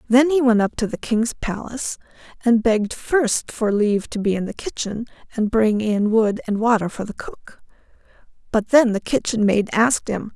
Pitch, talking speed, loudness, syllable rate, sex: 220 Hz, 195 wpm, -20 LUFS, 5.0 syllables/s, female